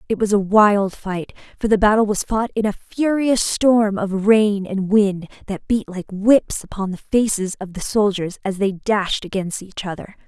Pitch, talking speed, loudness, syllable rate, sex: 205 Hz, 200 wpm, -19 LUFS, 4.5 syllables/s, female